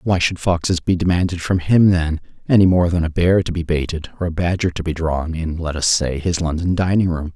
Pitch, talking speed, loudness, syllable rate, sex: 85 Hz, 245 wpm, -18 LUFS, 5.5 syllables/s, male